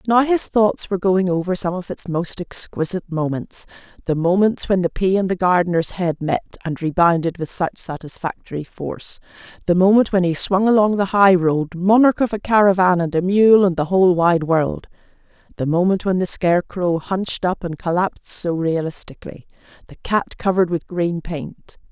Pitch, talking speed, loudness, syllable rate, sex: 180 Hz, 180 wpm, -18 LUFS, 5.1 syllables/s, female